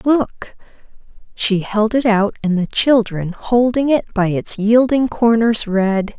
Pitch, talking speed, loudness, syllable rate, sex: 220 Hz, 145 wpm, -16 LUFS, 3.7 syllables/s, female